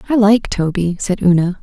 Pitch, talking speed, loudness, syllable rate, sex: 195 Hz, 185 wpm, -15 LUFS, 4.9 syllables/s, female